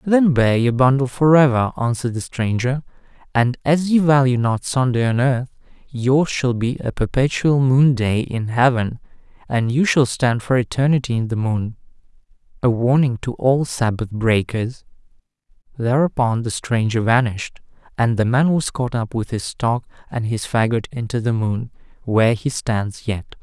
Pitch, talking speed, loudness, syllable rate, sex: 125 Hz, 160 wpm, -19 LUFS, 4.6 syllables/s, male